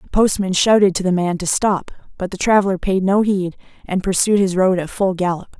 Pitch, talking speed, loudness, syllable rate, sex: 190 Hz, 225 wpm, -17 LUFS, 5.4 syllables/s, female